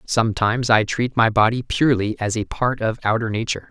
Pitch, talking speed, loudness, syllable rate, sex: 115 Hz, 195 wpm, -20 LUFS, 5.9 syllables/s, male